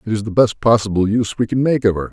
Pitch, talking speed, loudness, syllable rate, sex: 110 Hz, 310 wpm, -16 LUFS, 7.0 syllables/s, male